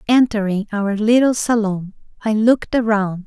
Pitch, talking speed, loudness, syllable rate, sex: 215 Hz, 130 wpm, -17 LUFS, 4.7 syllables/s, female